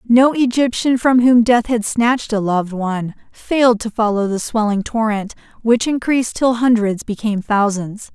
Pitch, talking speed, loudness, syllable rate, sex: 225 Hz, 160 wpm, -16 LUFS, 4.9 syllables/s, female